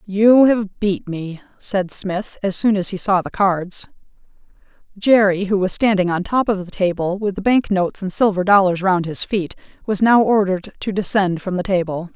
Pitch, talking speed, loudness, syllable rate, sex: 195 Hz, 195 wpm, -18 LUFS, 4.8 syllables/s, female